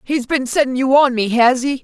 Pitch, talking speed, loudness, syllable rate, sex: 260 Hz, 260 wpm, -15 LUFS, 5.2 syllables/s, female